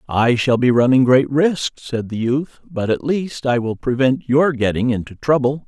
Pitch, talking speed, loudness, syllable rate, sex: 130 Hz, 200 wpm, -18 LUFS, 4.4 syllables/s, male